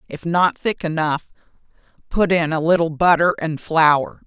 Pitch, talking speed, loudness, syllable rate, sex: 160 Hz, 155 wpm, -18 LUFS, 4.3 syllables/s, female